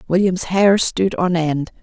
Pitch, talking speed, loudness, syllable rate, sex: 180 Hz, 165 wpm, -17 LUFS, 3.8 syllables/s, female